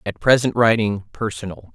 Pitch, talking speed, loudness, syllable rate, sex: 110 Hz, 105 wpm, -19 LUFS, 4.9 syllables/s, male